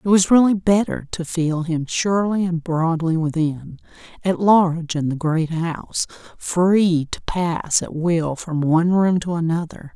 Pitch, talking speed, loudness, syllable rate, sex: 170 Hz, 155 wpm, -20 LUFS, 4.2 syllables/s, female